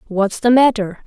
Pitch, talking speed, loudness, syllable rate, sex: 220 Hz, 170 wpm, -15 LUFS, 4.8 syllables/s, female